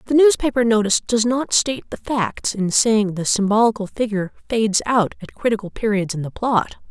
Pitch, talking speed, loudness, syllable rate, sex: 220 Hz, 185 wpm, -19 LUFS, 5.7 syllables/s, female